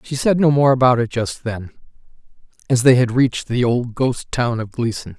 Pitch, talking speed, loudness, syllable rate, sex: 125 Hz, 210 wpm, -18 LUFS, 5.1 syllables/s, male